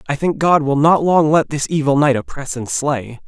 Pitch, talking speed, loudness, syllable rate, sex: 145 Hz, 240 wpm, -16 LUFS, 5.0 syllables/s, male